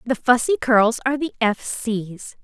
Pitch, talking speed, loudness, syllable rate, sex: 235 Hz, 175 wpm, -20 LUFS, 4.6 syllables/s, female